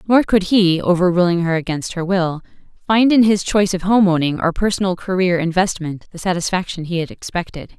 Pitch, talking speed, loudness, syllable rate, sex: 180 Hz, 185 wpm, -17 LUFS, 5.7 syllables/s, female